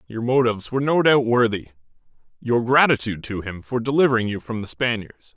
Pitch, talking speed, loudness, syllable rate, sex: 120 Hz, 180 wpm, -21 LUFS, 6.0 syllables/s, male